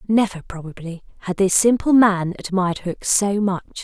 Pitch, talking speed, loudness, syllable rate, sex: 195 Hz, 155 wpm, -18 LUFS, 5.0 syllables/s, female